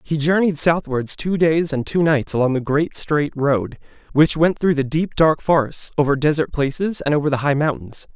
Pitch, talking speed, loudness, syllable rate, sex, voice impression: 150 Hz, 205 wpm, -19 LUFS, 4.9 syllables/s, male, very masculine, slightly young, slightly adult-like, slightly thick, tensed, slightly powerful, very bright, hard, clear, very fluent, slightly cool, intellectual, refreshing, sincere, slightly calm, very friendly, slightly reassuring, very unique, slightly elegant, slightly wild, slightly sweet, very lively, slightly kind, intense, very light